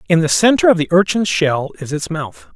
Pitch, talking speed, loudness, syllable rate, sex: 165 Hz, 235 wpm, -15 LUFS, 5.3 syllables/s, male